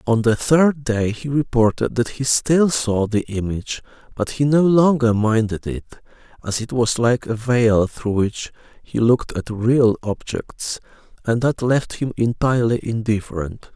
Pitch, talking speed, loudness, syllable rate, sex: 120 Hz, 160 wpm, -19 LUFS, 4.3 syllables/s, male